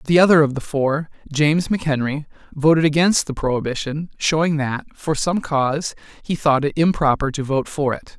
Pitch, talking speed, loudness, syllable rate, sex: 150 Hz, 170 wpm, -19 LUFS, 5.4 syllables/s, male